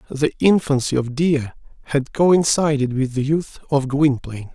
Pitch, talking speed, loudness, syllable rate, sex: 140 Hz, 145 wpm, -19 LUFS, 4.8 syllables/s, male